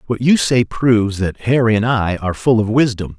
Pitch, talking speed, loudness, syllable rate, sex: 110 Hz, 225 wpm, -16 LUFS, 5.3 syllables/s, male